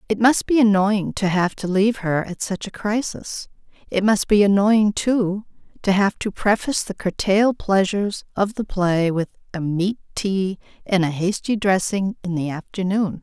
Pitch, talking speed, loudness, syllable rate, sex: 195 Hz, 175 wpm, -21 LUFS, 4.6 syllables/s, female